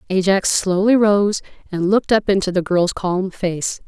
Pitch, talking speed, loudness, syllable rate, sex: 190 Hz, 170 wpm, -18 LUFS, 4.5 syllables/s, female